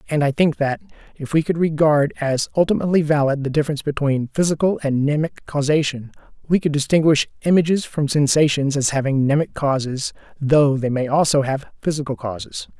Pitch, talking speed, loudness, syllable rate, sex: 145 Hz, 165 wpm, -19 LUFS, 5.7 syllables/s, male